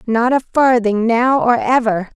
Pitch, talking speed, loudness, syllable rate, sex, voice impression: 235 Hz, 165 wpm, -15 LUFS, 4.1 syllables/s, female, feminine, adult-like, slightly muffled, fluent, slightly unique, slightly kind